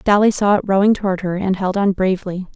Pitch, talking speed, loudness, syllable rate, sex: 195 Hz, 235 wpm, -17 LUFS, 6.3 syllables/s, female